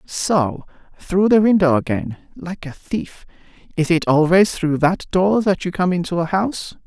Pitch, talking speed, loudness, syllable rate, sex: 175 Hz, 150 wpm, -18 LUFS, 4.6 syllables/s, male